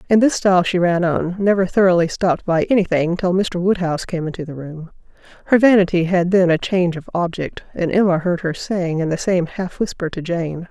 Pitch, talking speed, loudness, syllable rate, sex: 180 Hz, 220 wpm, -18 LUFS, 5.5 syllables/s, female